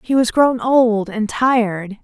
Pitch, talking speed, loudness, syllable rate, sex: 230 Hz, 175 wpm, -16 LUFS, 3.7 syllables/s, female